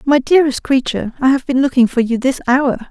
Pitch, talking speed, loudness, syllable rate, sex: 260 Hz, 225 wpm, -15 LUFS, 6.2 syllables/s, female